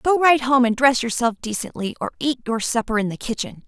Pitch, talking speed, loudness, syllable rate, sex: 245 Hz, 210 wpm, -20 LUFS, 5.7 syllables/s, female